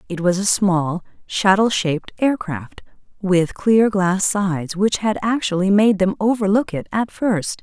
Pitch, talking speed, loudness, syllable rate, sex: 195 Hz, 165 wpm, -18 LUFS, 4.2 syllables/s, female